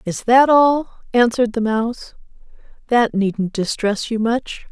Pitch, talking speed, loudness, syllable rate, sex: 230 Hz, 140 wpm, -17 LUFS, 4.1 syllables/s, female